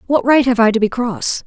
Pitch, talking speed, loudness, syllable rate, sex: 240 Hz, 285 wpm, -15 LUFS, 5.3 syllables/s, female